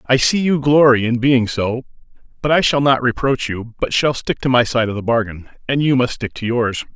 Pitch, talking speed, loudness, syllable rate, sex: 125 Hz, 240 wpm, -17 LUFS, 5.3 syllables/s, male